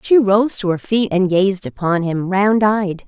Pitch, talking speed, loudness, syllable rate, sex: 195 Hz, 215 wpm, -16 LUFS, 4.0 syllables/s, female